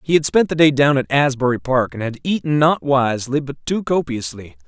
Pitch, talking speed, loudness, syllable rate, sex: 140 Hz, 220 wpm, -18 LUFS, 5.5 syllables/s, male